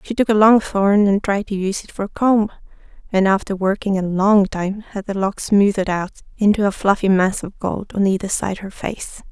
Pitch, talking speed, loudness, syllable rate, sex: 200 Hz, 225 wpm, -18 LUFS, 5.1 syllables/s, female